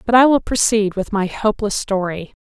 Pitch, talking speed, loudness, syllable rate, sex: 210 Hz, 200 wpm, -17 LUFS, 5.4 syllables/s, female